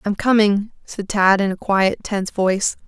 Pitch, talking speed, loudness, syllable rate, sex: 200 Hz, 190 wpm, -18 LUFS, 4.7 syllables/s, female